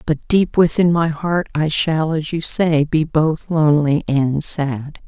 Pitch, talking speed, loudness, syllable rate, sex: 155 Hz, 175 wpm, -17 LUFS, 3.8 syllables/s, female